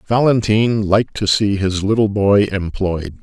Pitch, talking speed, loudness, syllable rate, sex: 100 Hz, 150 wpm, -16 LUFS, 4.7 syllables/s, male